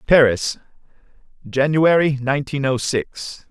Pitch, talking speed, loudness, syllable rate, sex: 140 Hz, 85 wpm, -19 LUFS, 4.1 syllables/s, male